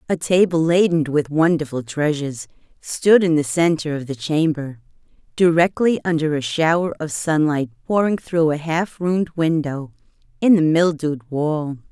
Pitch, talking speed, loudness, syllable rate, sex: 160 Hz, 145 wpm, -19 LUFS, 4.7 syllables/s, female